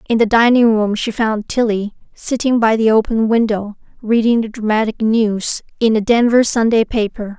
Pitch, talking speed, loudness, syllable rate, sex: 220 Hz, 170 wpm, -15 LUFS, 4.9 syllables/s, female